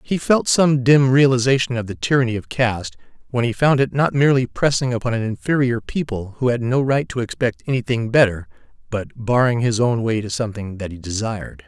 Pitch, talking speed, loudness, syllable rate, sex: 120 Hz, 200 wpm, -19 LUFS, 5.7 syllables/s, male